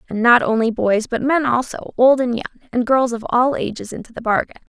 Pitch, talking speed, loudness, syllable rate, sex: 240 Hz, 225 wpm, -18 LUFS, 5.6 syllables/s, female